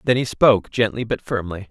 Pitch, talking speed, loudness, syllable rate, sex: 110 Hz, 210 wpm, -20 LUFS, 5.7 syllables/s, male